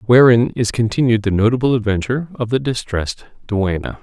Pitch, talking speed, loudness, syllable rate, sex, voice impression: 115 Hz, 150 wpm, -17 LUFS, 5.6 syllables/s, male, masculine, very adult-like, slightly thick, slightly fluent, cool, slightly refreshing, sincere, friendly